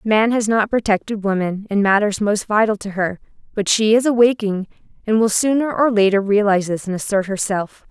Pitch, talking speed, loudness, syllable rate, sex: 210 Hz, 180 wpm, -18 LUFS, 5.4 syllables/s, female